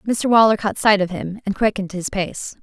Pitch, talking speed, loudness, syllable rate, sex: 200 Hz, 230 wpm, -19 LUFS, 5.5 syllables/s, female